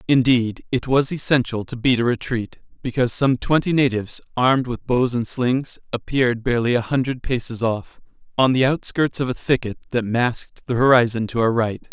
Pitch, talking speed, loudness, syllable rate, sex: 125 Hz, 180 wpm, -20 LUFS, 5.3 syllables/s, male